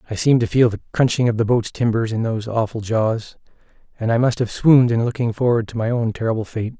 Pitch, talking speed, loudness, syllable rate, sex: 115 Hz, 240 wpm, -19 LUFS, 6.4 syllables/s, male